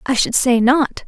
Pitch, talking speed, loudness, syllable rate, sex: 255 Hz, 225 wpm, -15 LUFS, 4.3 syllables/s, female